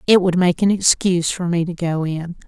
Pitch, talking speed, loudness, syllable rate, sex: 175 Hz, 245 wpm, -18 LUFS, 5.4 syllables/s, female